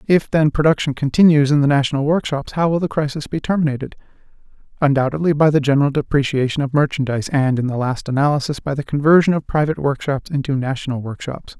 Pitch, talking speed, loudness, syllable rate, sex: 145 Hz, 180 wpm, -18 LUFS, 6.5 syllables/s, male